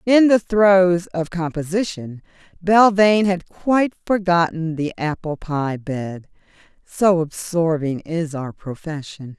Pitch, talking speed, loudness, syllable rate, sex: 170 Hz, 115 wpm, -19 LUFS, 3.8 syllables/s, female